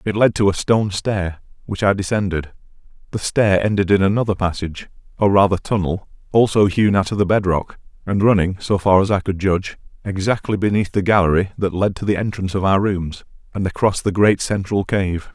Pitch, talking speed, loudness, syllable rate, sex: 95 Hz, 200 wpm, -18 LUFS, 5.6 syllables/s, male